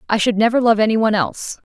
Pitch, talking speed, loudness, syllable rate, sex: 220 Hz, 245 wpm, -16 LUFS, 7.7 syllables/s, female